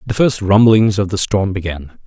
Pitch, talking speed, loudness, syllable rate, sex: 100 Hz, 205 wpm, -14 LUFS, 4.9 syllables/s, male